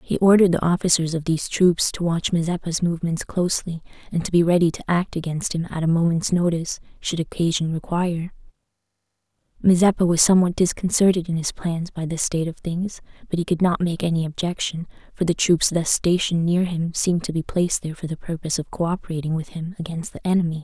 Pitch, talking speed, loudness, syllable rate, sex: 170 Hz, 200 wpm, -22 LUFS, 6.2 syllables/s, female